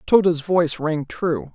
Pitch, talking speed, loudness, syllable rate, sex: 165 Hz, 155 wpm, -21 LUFS, 4.2 syllables/s, female